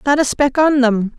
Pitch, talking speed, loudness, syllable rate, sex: 265 Hz, 255 wpm, -15 LUFS, 4.8 syllables/s, female